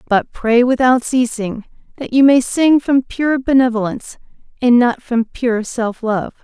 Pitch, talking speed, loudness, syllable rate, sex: 245 Hz, 160 wpm, -15 LUFS, 4.3 syllables/s, female